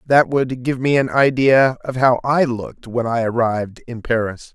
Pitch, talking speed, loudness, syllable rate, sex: 125 Hz, 200 wpm, -18 LUFS, 4.7 syllables/s, male